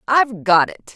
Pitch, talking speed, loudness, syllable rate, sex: 225 Hz, 190 wpm, -17 LUFS, 5.1 syllables/s, female